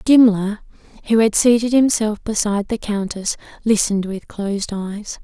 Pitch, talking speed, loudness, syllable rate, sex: 210 Hz, 140 wpm, -18 LUFS, 4.8 syllables/s, female